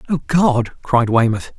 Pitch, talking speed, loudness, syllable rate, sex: 130 Hz, 150 wpm, -17 LUFS, 4.1 syllables/s, male